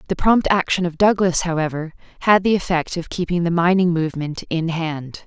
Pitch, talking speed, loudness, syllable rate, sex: 170 Hz, 180 wpm, -19 LUFS, 5.4 syllables/s, female